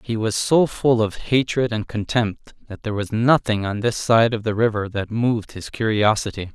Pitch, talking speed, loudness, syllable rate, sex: 110 Hz, 200 wpm, -20 LUFS, 4.9 syllables/s, male